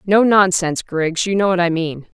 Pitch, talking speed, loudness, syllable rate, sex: 180 Hz, 220 wpm, -17 LUFS, 5.1 syllables/s, female